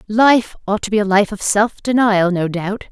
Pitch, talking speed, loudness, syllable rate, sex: 210 Hz, 225 wpm, -16 LUFS, 4.6 syllables/s, female